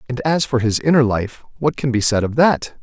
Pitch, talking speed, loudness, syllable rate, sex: 125 Hz, 255 wpm, -17 LUFS, 5.2 syllables/s, male